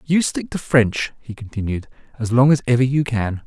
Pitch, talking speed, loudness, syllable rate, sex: 120 Hz, 210 wpm, -19 LUFS, 5.1 syllables/s, male